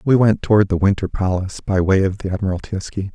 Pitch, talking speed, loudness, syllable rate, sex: 95 Hz, 210 wpm, -18 LUFS, 6.3 syllables/s, male